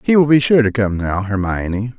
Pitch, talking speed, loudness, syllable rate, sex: 115 Hz, 240 wpm, -16 LUFS, 5.3 syllables/s, male